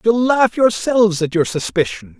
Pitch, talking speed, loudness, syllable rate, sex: 200 Hz, 165 wpm, -16 LUFS, 4.8 syllables/s, male